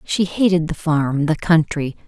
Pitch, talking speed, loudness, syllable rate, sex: 160 Hz, 175 wpm, -18 LUFS, 4.2 syllables/s, female